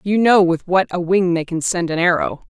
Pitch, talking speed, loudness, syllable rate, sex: 180 Hz, 260 wpm, -17 LUFS, 5.2 syllables/s, female